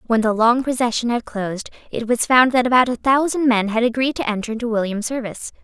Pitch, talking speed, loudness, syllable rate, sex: 235 Hz, 225 wpm, -18 LUFS, 6.0 syllables/s, female